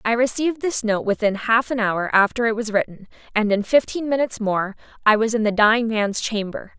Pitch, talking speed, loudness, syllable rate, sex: 225 Hz, 210 wpm, -20 LUFS, 5.6 syllables/s, female